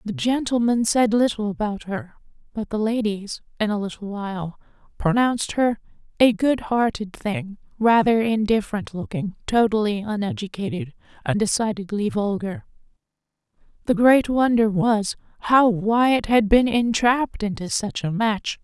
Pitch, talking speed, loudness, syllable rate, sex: 215 Hz, 130 wpm, -21 LUFS, 4.6 syllables/s, female